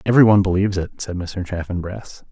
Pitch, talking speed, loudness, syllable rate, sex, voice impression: 95 Hz, 180 wpm, -19 LUFS, 6.5 syllables/s, male, very masculine, very adult-like, middle-aged, very thick, tensed, powerful, bright, slightly soft, slightly muffled, fluent, slightly raspy, very cool, slightly intellectual, slightly refreshing, sincere, calm, very mature, friendly, reassuring, slightly unique, wild